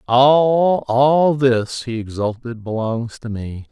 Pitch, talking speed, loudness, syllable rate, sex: 125 Hz, 115 wpm, -17 LUFS, 3.1 syllables/s, male